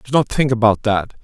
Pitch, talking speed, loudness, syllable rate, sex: 115 Hz, 240 wpm, -17 LUFS, 5.4 syllables/s, male